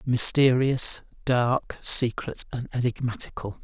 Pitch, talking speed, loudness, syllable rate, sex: 125 Hz, 85 wpm, -23 LUFS, 3.8 syllables/s, male